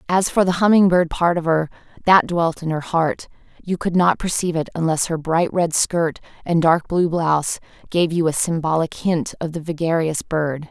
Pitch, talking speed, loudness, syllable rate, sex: 165 Hz, 200 wpm, -19 LUFS, 5.0 syllables/s, female